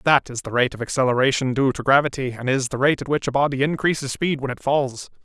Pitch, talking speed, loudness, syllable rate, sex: 135 Hz, 250 wpm, -21 LUFS, 6.3 syllables/s, male